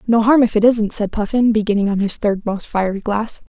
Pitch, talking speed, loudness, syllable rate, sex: 215 Hz, 235 wpm, -17 LUFS, 5.4 syllables/s, female